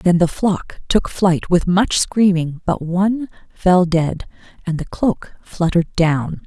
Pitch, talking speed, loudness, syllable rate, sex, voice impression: 180 Hz, 160 wpm, -18 LUFS, 3.8 syllables/s, female, feminine, adult-like, slightly tensed, powerful, slightly soft, clear, fluent, intellectual, slightly calm, reassuring, elegant, lively, sharp